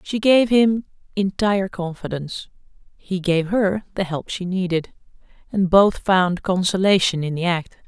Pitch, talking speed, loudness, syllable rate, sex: 190 Hz, 145 wpm, -20 LUFS, 4.5 syllables/s, female